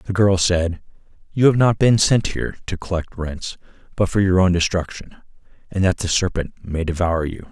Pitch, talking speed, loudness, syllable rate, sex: 90 Hz, 190 wpm, -19 LUFS, 5.0 syllables/s, male